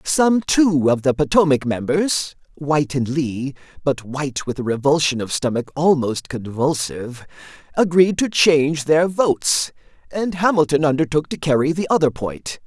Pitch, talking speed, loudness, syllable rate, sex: 150 Hz, 145 wpm, -19 LUFS, 3.4 syllables/s, male